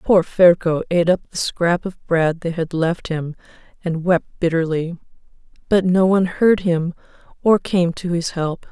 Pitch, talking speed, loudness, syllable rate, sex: 175 Hz, 170 wpm, -19 LUFS, 4.4 syllables/s, female